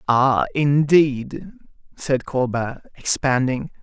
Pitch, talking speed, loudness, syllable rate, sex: 135 Hz, 80 wpm, -20 LUFS, 3.0 syllables/s, male